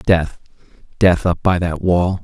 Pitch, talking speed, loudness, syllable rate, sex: 85 Hz, 160 wpm, -17 LUFS, 4.0 syllables/s, male